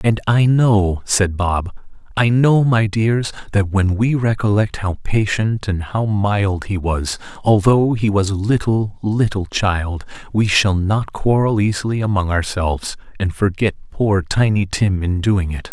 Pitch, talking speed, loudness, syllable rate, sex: 100 Hz, 160 wpm, -17 LUFS, 4.0 syllables/s, male